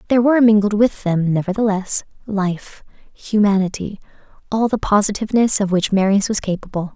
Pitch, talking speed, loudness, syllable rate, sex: 205 Hz, 140 wpm, -17 LUFS, 5.5 syllables/s, female